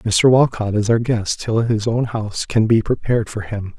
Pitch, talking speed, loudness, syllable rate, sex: 110 Hz, 220 wpm, -18 LUFS, 4.8 syllables/s, male